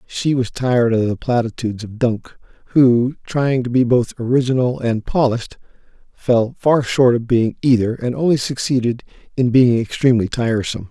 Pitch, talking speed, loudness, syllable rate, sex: 120 Hz, 160 wpm, -17 LUFS, 5.1 syllables/s, male